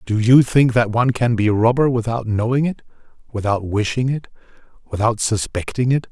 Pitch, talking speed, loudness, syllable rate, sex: 115 Hz, 175 wpm, -18 LUFS, 5.6 syllables/s, male